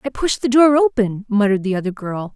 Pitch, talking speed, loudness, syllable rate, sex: 225 Hz, 230 wpm, -17 LUFS, 5.9 syllables/s, female